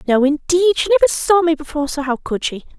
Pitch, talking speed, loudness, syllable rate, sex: 315 Hz, 215 wpm, -17 LUFS, 6.3 syllables/s, female